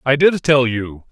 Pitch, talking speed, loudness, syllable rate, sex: 130 Hz, 215 wpm, -16 LUFS, 4.0 syllables/s, male